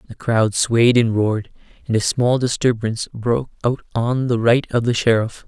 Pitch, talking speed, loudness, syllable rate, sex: 115 Hz, 185 wpm, -18 LUFS, 4.9 syllables/s, male